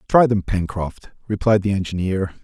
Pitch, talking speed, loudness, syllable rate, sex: 100 Hz, 150 wpm, -20 LUFS, 5.0 syllables/s, male